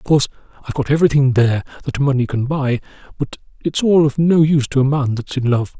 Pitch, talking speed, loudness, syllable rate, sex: 140 Hz, 215 wpm, -17 LUFS, 6.8 syllables/s, male